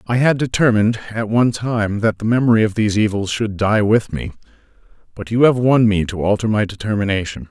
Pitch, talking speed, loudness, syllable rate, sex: 110 Hz, 200 wpm, -17 LUFS, 5.9 syllables/s, male